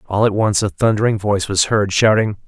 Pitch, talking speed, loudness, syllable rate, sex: 105 Hz, 220 wpm, -16 LUFS, 5.9 syllables/s, male